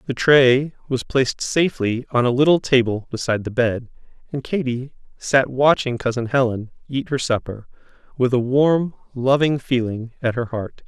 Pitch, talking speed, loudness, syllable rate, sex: 130 Hz, 160 wpm, -20 LUFS, 4.8 syllables/s, male